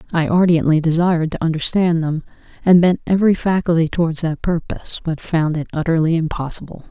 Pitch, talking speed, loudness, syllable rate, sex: 165 Hz, 155 wpm, -18 LUFS, 6.0 syllables/s, female